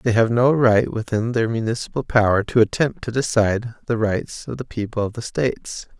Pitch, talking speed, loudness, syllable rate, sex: 115 Hz, 200 wpm, -20 LUFS, 5.3 syllables/s, male